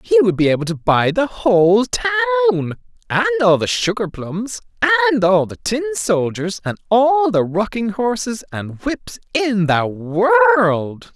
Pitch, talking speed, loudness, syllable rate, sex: 225 Hz, 155 wpm, -17 LUFS, 4.3 syllables/s, male